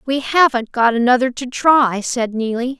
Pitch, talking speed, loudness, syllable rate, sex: 250 Hz, 170 wpm, -16 LUFS, 4.5 syllables/s, female